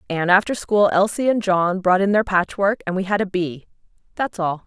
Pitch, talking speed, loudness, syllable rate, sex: 190 Hz, 220 wpm, -19 LUFS, 5.1 syllables/s, female